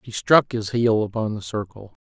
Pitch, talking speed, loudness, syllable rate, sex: 110 Hz, 205 wpm, -21 LUFS, 4.8 syllables/s, male